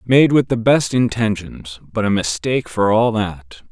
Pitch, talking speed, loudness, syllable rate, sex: 110 Hz, 160 wpm, -17 LUFS, 4.3 syllables/s, male